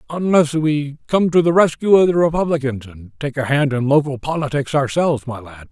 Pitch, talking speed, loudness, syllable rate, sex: 145 Hz, 200 wpm, -17 LUFS, 5.4 syllables/s, male